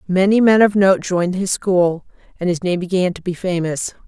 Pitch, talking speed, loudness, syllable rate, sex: 185 Hz, 205 wpm, -17 LUFS, 5.1 syllables/s, female